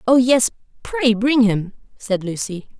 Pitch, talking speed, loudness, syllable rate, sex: 230 Hz, 150 wpm, -18 LUFS, 4.0 syllables/s, female